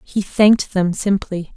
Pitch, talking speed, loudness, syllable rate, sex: 195 Hz, 155 wpm, -17 LUFS, 4.1 syllables/s, female